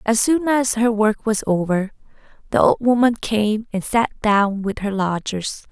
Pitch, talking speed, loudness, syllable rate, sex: 220 Hz, 180 wpm, -19 LUFS, 4.2 syllables/s, female